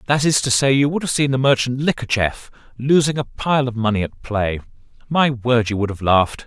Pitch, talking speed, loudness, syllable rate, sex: 125 Hz, 215 wpm, -18 LUFS, 5.2 syllables/s, male